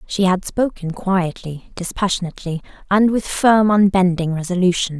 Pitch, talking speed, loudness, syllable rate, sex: 185 Hz, 120 wpm, -18 LUFS, 4.8 syllables/s, female